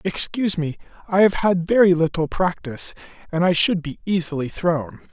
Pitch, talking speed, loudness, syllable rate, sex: 175 Hz, 165 wpm, -20 LUFS, 5.3 syllables/s, male